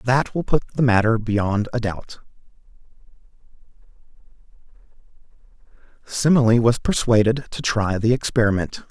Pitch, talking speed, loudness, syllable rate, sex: 115 Hz, 100 wpm, -20 LUFS, 4.8 syllables/s, male